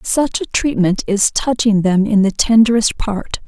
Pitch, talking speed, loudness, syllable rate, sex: 220 Hz, 175 wpm, -15 LUFS, 4.3 syllables/s, female